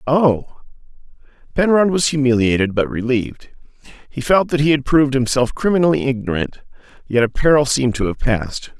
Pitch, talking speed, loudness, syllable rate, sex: 135 Hz, 150 wpm, -17 LUFS, 5.8 syllables/s, male